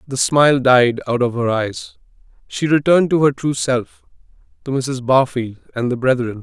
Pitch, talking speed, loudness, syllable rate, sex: 130 Hz, 175 wpm, -17 LUFS, 4.8 syllables/s, male